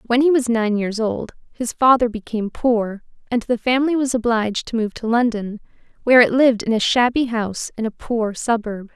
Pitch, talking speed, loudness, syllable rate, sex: 230 Hz, 200 wpm, -19 LUFS, 5.5 syllables/s, female